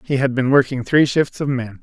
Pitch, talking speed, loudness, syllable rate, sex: 130 Hz, 265 wpm, -18 LUFS, 5.2 syllables/s, male